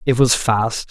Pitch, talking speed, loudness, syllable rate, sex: 115 Hz, 200 wpm, -17 LUFS, 3.8 syllables/s, male